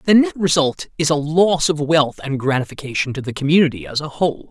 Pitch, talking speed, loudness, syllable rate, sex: 150 Hz, 215 wpm, -18 LUFS, 5.9 syllables/s, male